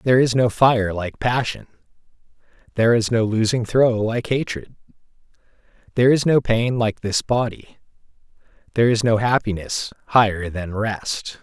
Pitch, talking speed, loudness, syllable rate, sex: 115 Hz, 140 wpm, -20 LUFS, 4.8 syllables/s, male